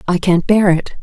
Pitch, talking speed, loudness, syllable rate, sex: 185 Hz, 235 wpm, -14 LUFS, 4.7 syllables/s, female